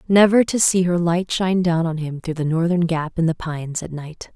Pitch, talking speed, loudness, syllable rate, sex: 170 Hz, 250 wpm, -19 LUFS, 5.3 syllables/s, female